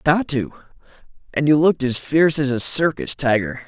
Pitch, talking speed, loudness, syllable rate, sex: 145 Hz, 195 wpm, -18 LUFS, 6.1 syllables/s, male